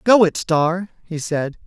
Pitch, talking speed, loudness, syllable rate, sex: 170 Hz, 180 wpm, -19 LUFS, 3.7 syllables/s, male